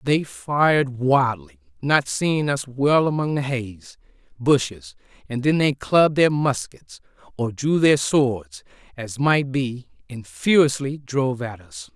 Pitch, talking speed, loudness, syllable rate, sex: 140 Hz, 145 wpm, -21 LUFS, 3.9 syllables/s, female